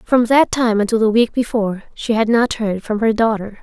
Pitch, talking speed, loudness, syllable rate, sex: 225 Hz, 230 wpm, -17 LUFS, 5.3 syllables/s, female